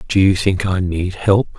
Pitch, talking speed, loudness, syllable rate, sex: 95 Hz, 225 wpm, -17 LUFS, 4.4 syllables/s, male